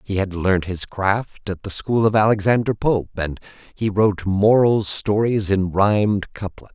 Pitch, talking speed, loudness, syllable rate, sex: 100 Hz, 170 wpm, -19 LUFS, 4.3 syllables/s, male